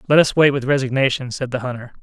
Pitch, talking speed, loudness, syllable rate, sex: 130 Hz, 235 wpm, -18 LUFS, 6.7 syllables/s, male